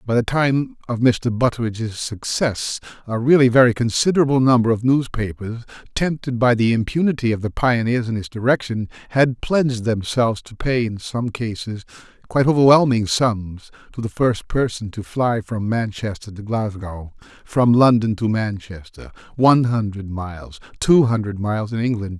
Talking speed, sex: 160 wpm, male